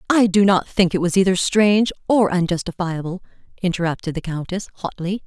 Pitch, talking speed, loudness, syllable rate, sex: 185 Hz, 160 wpm, -19 LUFS, 5.7 syllables/s, female